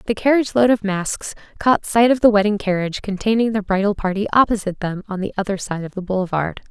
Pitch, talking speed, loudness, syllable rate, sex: 205 Hz, 215 wpm, -19 LUFS, 6.4 syllables/s, female